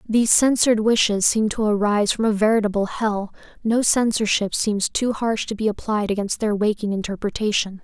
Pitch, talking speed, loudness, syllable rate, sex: 210 Hz, 170 wpm, -20 LUFS, 5.4 syllables/s, female